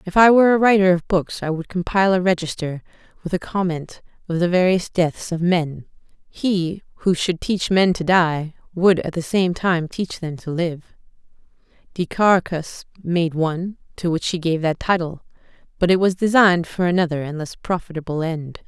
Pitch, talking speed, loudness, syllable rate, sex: 175 Hz, 180 wpm, -20 LUFS, 5.0 syllables/s, female